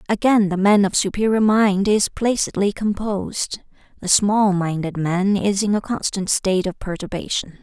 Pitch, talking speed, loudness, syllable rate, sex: 200 Hz, 155 wpm, -19 LUFS, 4.7 syllables/s, female